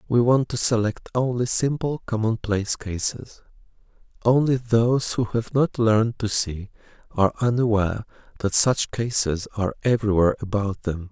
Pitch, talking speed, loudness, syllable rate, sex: 110 Hz, 135 wpm, -22 LUFS, 5.1 syllables/s, male